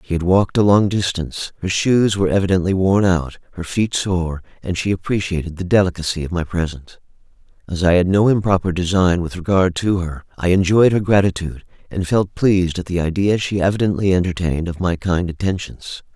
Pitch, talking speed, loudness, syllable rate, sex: 90 Hz, 185 wpm, -18 LUFS, 5.7 syllables/s, male